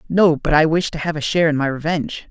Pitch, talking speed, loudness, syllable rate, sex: 155 Hz, 285 wpm, -18 LUFS, 6.7 syllables/s, male